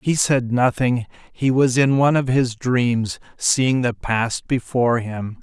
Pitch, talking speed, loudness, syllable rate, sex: 125 Hz, 165 wpm, -19 LUFS, 3.8 syllables/s, male